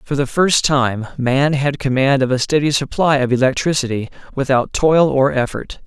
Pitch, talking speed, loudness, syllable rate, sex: 135 Hz, 175 wpm, -16 LUFS, 4.8 syllables/s, male